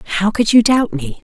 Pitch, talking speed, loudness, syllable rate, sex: 205 Hz, 230 wpm, -14 LUFS, 6.0 syllables/s, female